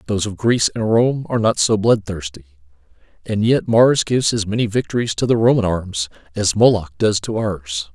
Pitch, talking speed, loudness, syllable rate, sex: 105 Hz, 190 wpm, -18 LUFS, 5.4 syllables/s, male